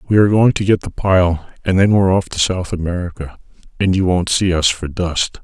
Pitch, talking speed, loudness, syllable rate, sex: 90 Hz, 230 wpm, -16 LUFS, 5.5 syllables/s, male